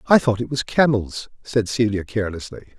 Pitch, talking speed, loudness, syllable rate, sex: 115 Hz, 175 wpm, -21 LUFS, 5.4 syllables/s, male